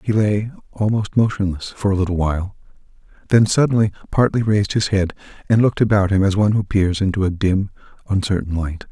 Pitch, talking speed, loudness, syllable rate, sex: 100 Hz, 180 wpm, -18 LUFS, 6.1 syllables/s, male